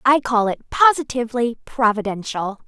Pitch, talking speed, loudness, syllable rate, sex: 240 Hz, 110 wpm, -19 LUFS, 4.9 syllables/s, female